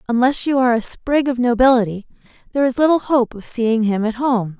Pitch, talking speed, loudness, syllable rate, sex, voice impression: 245 Hz, 210 wpm, -17 LUFS, 5.8 syllables/s, female, feminine, adult-like, tensed, slightly powerful, bright, clear, slightly nasal, intellectual, unique, lively, intense, sharp